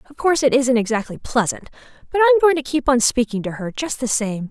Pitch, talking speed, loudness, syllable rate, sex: 255 Hz, 240 wpm, -19 LUFS, 6.4 syllables/s, female